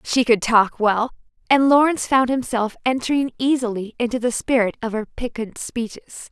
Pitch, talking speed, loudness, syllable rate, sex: 240 Hz, 160 wpm, -20 LUFS, 5.0 syllables/s, female